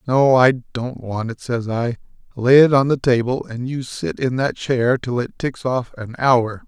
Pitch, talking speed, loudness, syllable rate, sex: 125 Hz, 215 wpm, -19 LUFS, 4.2 syllables/s, male